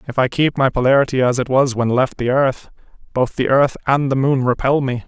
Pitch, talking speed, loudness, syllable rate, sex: 130 Hz, 235 wpm, -17 LUFS, 5.5 syllables/s, male